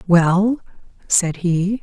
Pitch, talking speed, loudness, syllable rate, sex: 185 Hz, 100 wpm, -18 LUFS, 2.5 syllables/s, female